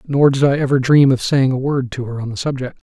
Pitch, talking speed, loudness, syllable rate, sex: 135 Hz, 290 wpm, -16 LUFS, 5.9 syllables/s, male